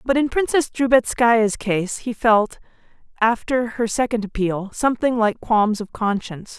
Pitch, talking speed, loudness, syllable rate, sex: 230 Hz, 145 wpm, -20 LUFS, 4.5 syllables/s, female